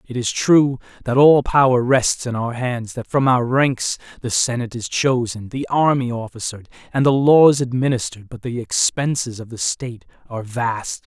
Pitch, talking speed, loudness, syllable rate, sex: 125 Hz, 180 wpm, -18 LUFS, 4.9 syllables/s, male